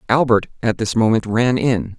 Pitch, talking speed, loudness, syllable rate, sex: 115 Hz, 180 wpm, -17 LUFS, 4.7 syllables/s, male